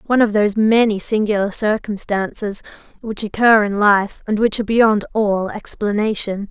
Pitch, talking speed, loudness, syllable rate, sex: 210 Hz, 150 wpm, -17 LUFS, 5.0 syllables/s, female